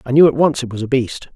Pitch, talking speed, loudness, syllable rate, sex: 125 Hz, 355 wpm, -16 LUFS, 6.6 syllables/s, male